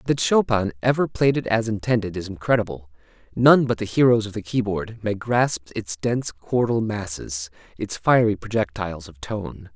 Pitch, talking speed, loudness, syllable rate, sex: 105 Hz, 165 wpm, -22 LUFS, 5.1 syllables/s, male